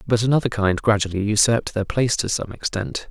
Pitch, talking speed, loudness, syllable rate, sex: 110 Hz, 195 wpm, -21 LUFS, 6.1 syllables/s, male